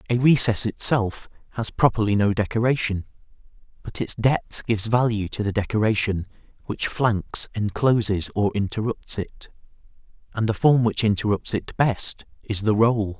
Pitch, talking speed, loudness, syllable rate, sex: 110 Hz, 140 wpm, -22 LUFS, 4.7 syllables/s, male